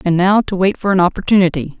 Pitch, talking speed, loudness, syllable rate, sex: 180 Hz, 235 wpm, -14 LUFS, 6.5 syllables/s, female